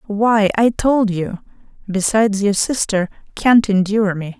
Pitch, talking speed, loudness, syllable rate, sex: 205 Hz, 135 wpm, -17 LUFS, 4.3 syllables/s, female